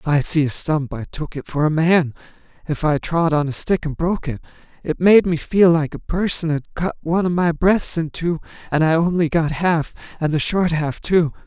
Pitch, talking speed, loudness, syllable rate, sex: 160 Hz, 235 wpm, -19 LUFS, 5.1 syllables/s, male